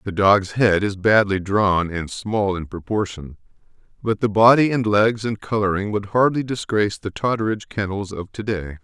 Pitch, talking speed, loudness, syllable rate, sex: 105 Hz, 175 wpm, -20 LUFS, 4.9 syllables/s, male